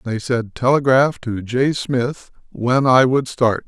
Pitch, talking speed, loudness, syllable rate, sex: 125 Hz, 165 wpm, -18 LUFS, 3.6 syllables/s, male